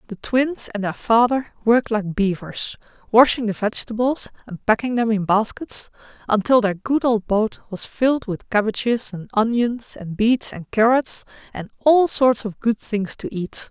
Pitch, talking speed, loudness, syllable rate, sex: 225 Hz, 170 wpm, -20 LUFS, 4.5 syllables/s, female